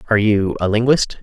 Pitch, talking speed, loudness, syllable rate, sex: 110 Hz, 195 wpm, -16 LUFS, 6.4 syllables/s, male